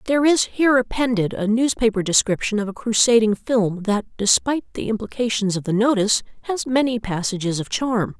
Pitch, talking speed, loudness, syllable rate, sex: 225 Hz, 170 wpm, -20 LUFS, 5.6 syllables/s, female